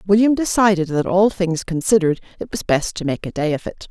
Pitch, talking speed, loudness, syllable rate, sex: 180 Hz, 230 wpm, -19 LUFS, 5.9 syllables/s, female